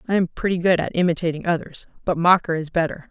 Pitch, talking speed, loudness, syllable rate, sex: 170 Hz, 195 wpm, -21 LUFS, 6.2 syllables/s, female